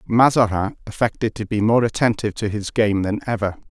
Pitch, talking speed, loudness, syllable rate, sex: 110 Hz, 180 wpm, -20 LUFS, 5.7 syllables/s, male